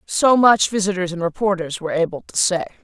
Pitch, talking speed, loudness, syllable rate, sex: 185 Hz, 190 wpm, -18 LUFS, 5.9 syllables/s, female